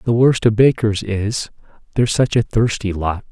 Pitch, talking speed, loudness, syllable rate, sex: 110 Hz, 180 wpm, -17 LUFS, 4.7 syllables/s, male